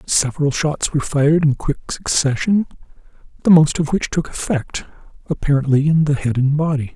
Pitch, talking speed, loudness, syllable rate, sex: 150 Hz, 165 wpm, -17 LUFS, 5.4 syllables/s, male